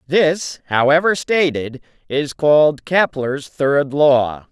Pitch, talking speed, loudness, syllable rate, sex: 145 Hz, 105 wpm, -17 LUFS, 2.7 syllables/s, male